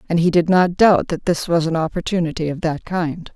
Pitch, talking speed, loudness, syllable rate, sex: 170 Hz, 235 wpm, -18 LUFS, 5.4 syllables/s, female